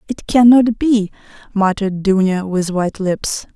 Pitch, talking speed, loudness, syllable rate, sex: 205 Hz, 135 wpm, -15 LUFS, 4.5 syllables/s, female